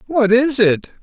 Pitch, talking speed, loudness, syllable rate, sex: 235 Hz, 175 wpm, -14 LUFS, 3.9 syllables/s, male